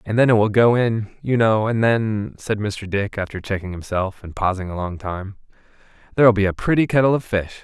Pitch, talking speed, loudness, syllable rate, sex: 105 Hz, 210 wpm, -20 LUFS, 5.3 syllables/s, male